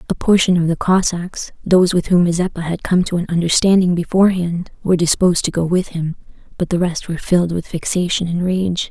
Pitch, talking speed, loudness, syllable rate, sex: 175 Hz, 200 wpm, -17 LUFS, 5.9 syllables/s, female